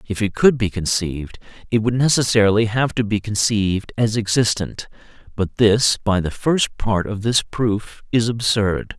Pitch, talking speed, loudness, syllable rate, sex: 110 Hz, 165 wpm, -19 LUFS, 4.2 syllables/s, male